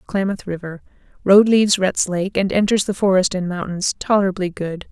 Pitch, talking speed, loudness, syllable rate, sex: 190 Hz, 160 wpm, -18 LUFS, 5.3 syllables/s, female